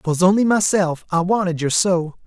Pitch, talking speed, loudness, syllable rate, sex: 180 Hz, 160 wpm, -18 LUFS, 4.7 syllables/s, male